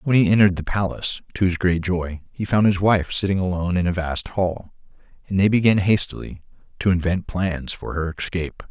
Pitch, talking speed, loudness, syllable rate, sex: 90 Hz, 200 wpm, -21 LUFS, 5.6 syllables/s, male